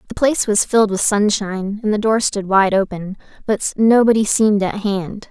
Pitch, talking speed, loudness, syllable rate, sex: 205 Hz, 190 wpm, -16 LUFS, 5.3 syllables/s, female